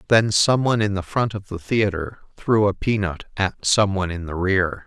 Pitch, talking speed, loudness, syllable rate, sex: 100 Hz, 220 wpm, -21 LUFS, 5.0 syllables/s, male